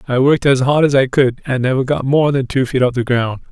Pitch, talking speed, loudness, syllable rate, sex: 130 Hz, 290 wpm, -15 LUFS, 6.0 syllables/s, male